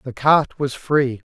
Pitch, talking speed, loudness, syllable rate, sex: 135 Hz, 175 wpm, -19 LUFS, 3.5 syllables/s, male